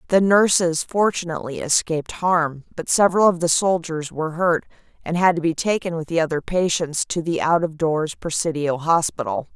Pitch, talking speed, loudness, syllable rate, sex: 165 Hz, 175 wpm, -20 LUFS, 5.2 syllables/s, female